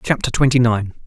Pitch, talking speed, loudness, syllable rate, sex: 120 Hz, 170 wpm, -17 LUFS, 5.8 syllables/s, male